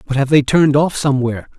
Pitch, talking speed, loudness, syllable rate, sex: 140 Hz, 230 wpm, -15 LUFS, 7.3 syllables/s, male